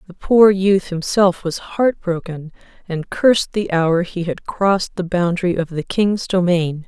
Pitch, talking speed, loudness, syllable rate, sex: 180 Hz, 175 wpm, -18 LUFS, 4.3 syllables/s, female